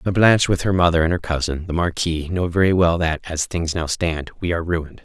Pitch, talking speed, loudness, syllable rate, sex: 85 Hz, 240 wpm, -20 LUFS, 5.8 syllables/s, male